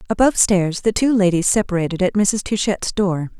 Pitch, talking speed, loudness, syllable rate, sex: 195 Hz, 175 wpm, -18 LUFS, 5.5 syllables/s, female